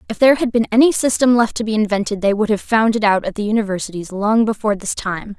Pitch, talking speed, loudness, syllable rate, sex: 215 Hz, 255 wpm, -17 LUFS, 6.5 syllables/s, female